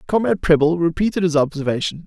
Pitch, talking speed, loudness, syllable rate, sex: 165 Hz, 145 wpm, -18 LUFS, 6.8 syllables/s, male